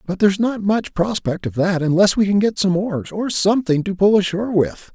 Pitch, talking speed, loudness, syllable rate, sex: 195 Hz, 230 wpm, -18 LUFS, 5.4 syllables/s, male